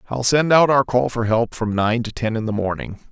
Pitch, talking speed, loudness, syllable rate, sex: 115 Hz, 270 wpm, -19 LUFS, 5.3 syllables/s, male